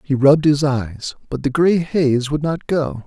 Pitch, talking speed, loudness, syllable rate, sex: 140 Hz, 215 wpm, -18 LUFS, 4.4 syllables/s, male